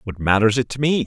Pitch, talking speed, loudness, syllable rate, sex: 120 Hz, 280 wpm, -19 LUFS, 6.5 syllables/s, male